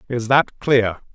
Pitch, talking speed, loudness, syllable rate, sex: 120 Hz, 155 wpm, -18 LUFS, 3.7 syllables/s, male